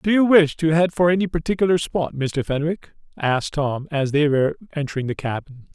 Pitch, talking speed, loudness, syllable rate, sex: 155 Hz, 200 wpm, -21 LUFS, 5.7 syllables/s, male